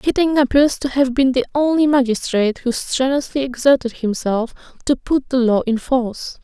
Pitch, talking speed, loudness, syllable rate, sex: 260 Hz, 170 wpm, -17 LUFS, 5.1 syllables/s, female